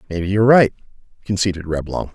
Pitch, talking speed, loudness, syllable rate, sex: 95 Hz, 140 wpm, -18 LUFS, 6.9 syllables/s, male